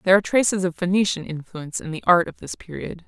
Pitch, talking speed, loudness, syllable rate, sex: 180 Hz, 235 wpm, -22 LUFS, 6.9 syllables/s, female